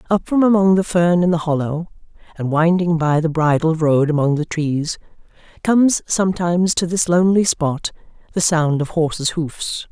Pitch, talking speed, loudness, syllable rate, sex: 165 Hz, 170 wpm, -17 LUFS, 4.9 syllables/s, female